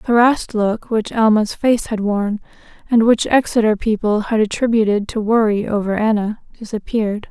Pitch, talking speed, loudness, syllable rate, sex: 220 Hz, 155 wpm, -17 LUFS, 5.1 syllables/s, female